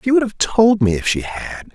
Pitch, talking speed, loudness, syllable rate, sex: 155 Hz, 275 wpm, -17 LUFS, 4.9 syllables/s, male